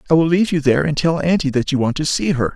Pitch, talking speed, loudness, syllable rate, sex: 155 Hz, 330 wpm, -17 LUFS, 7.3 syllables/s, male